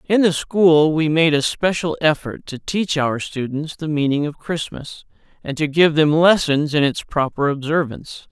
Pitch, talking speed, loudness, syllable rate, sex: 155 Hz, 180 wpm, -18 LUFS, 4.6 syllables/s, male